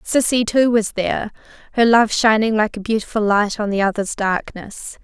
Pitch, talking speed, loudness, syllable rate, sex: 215 Hz, 180 wpm, -18 LUFS, 4.9 syllables/s, female